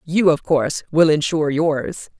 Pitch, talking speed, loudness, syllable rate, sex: 155 Hz, 165 wpm, -18 LUFS, 4.7 syllables/s, female